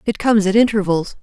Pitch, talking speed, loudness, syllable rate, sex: 205 Hz, 195 wpm, -16 LUFS, 6.5 syllables/s, female